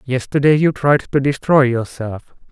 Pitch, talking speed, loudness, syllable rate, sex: 135 Hz, 145 wpm, -16 LUFS, 4.7 syllables/s, male